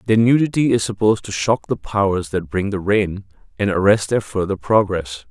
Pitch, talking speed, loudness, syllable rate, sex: 100 Hz, 190 wpm, -18 LUFS, 5.3 syllables/s, male